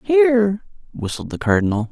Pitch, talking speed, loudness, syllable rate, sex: 135 Hz, 125 wpm, -19 LUFS, 5.2 syllables/s, male